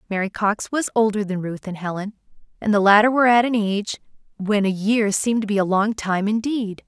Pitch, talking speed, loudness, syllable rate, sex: 210 Hz, 220 wpm, -20 LUFS, 5.7 syllables/s, female